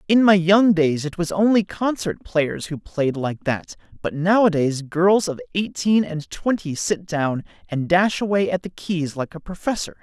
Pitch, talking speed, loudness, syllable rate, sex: 175 Hz, 185 wpm, -21 LUFS, 4.4 syllables/s, male